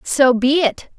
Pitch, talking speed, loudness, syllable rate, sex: 270 Hz, 185 wpm, -16 LUFS, 3.6 syllables/s, female